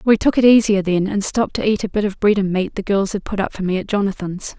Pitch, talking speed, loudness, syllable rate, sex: 200 Hz, 315 wpm, -18 LUFS, 6.2 syllables/s, female